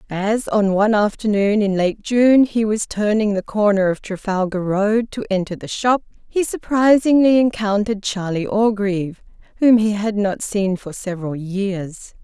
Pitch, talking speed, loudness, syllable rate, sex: 205 Hz, 155 wpm, -18 LUFS, 4.5 syllables/s, female